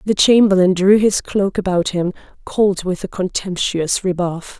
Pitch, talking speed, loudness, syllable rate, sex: 190 Hz, 155 wpm, -17 LUFS, 4.3 syllables/s, female